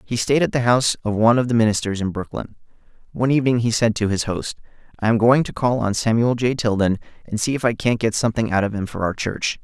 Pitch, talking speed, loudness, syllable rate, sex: 115 Hz, 255 wpm, -20 LUFS, 6.5 syllables/s, male